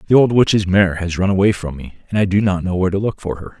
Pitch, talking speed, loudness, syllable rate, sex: 95 Hz, 315 wpm, -17 LUFS, 6.4 syllables/s, male